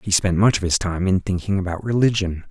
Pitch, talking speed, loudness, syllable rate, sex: 95 Hz, 240 wpm, -20 LUFS, 5.9 syllables/s, male